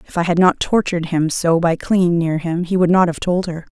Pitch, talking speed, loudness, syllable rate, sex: 175 Hz, 270 wpm, -17 LUFS, 5.7 syllables/s, female